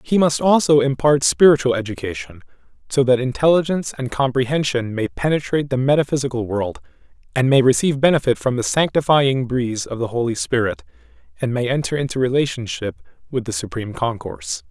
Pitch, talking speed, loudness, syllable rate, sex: 130 Hz, 150 wpm, -19 LUFS, 6.0 syllables/s, male